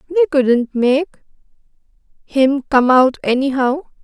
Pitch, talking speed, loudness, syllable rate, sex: 275 Hz, 90 wpm, -15 LUFS, 3.7 syllables/s, female